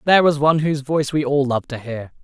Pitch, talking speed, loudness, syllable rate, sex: 140 Hz, 270 wpm, -19 LUFS, 7.4 syllables/s, male